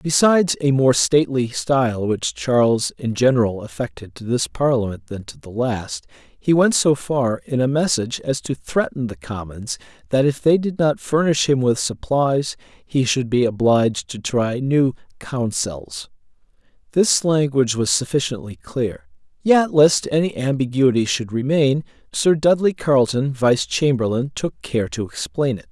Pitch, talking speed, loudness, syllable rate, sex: 130 Hz, 155 wpm, -19 LUFS, 4.5 syllables/s, male